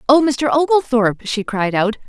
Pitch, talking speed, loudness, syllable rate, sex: 245 Hz, 175 wpm, -17 LUFS, 5.1 syllables/s, female